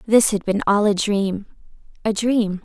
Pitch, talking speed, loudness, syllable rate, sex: 205 Hz, 160 wpm, -20 LUFS, 4.2 syllables/s, female